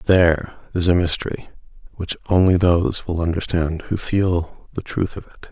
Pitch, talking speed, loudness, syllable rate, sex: 85 Hz, 165 wpm, -20 LUFS, 4.8 syllables/s, male